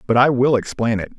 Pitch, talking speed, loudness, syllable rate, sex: 125 Hz, 255 wpm, -18 LUFS, 5.9 syllables/s, male